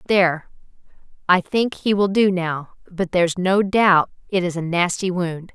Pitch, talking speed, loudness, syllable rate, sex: 185 Hz, 175 wpm, -19 LUFS, 4.5 syllables/s, female